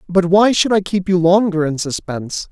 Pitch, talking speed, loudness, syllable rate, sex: 180 Hz, 215 wpm, -16 LUFS, 5.1 syllables/s, male